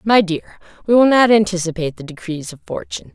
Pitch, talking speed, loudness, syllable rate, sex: 190 Hz, 190 wpm, -17 LUFS, 6.3 syllables/s, female